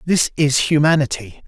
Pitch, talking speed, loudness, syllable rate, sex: 145 Hz, 120 wpm, -16 LUFS, 4.6 syllables/s, male